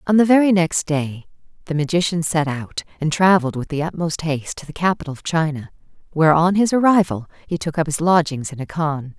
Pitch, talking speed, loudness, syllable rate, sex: 160 Hz, 210 wpm, -19 LUFS, 5.8 syllables/s, female